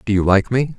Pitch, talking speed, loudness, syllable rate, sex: 110 Hz, 305 wpm, -16 LUFS, 5.8 syllables/s, male